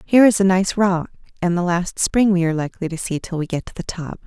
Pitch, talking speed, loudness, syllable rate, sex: 180 Hz, 265 wpm, -19 LUFS, 6.0 syllables/s, female